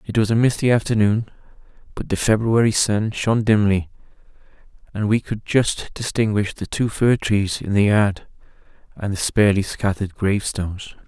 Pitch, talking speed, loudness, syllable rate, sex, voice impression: 105 Hz, 150 wpm, -20 LUFS, 5.2 syllables/s, male, masculine, adult-like, slightly halting, slightly refreshing, sincere, slightly calm